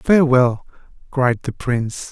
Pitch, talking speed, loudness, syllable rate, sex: 130 Hz, 115 wpm, -18 LUFS, 4.3 syllables/s, male